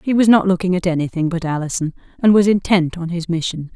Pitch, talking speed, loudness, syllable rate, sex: 180 Hz, 225 wpm, -17 LUFS, 6.2 syllables/s, female